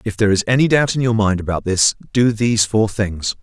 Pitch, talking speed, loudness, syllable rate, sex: 110 Hz, 245 wpm, -17 LUFS, 5.8 syllables/s, male